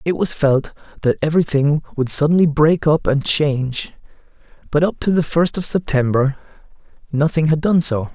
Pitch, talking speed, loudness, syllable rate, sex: 150 Hz, 160 wpm, -17 LUFS, 5.1 syllables/s, male